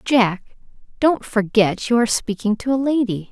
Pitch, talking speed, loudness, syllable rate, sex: 230 Hz, 165 wpm, -19 LUFS, 4.9 syllables/s, female